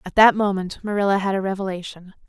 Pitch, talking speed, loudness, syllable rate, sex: 195 Hz, 185 wpm, -21 LUFS, 6.4 syllables/s, female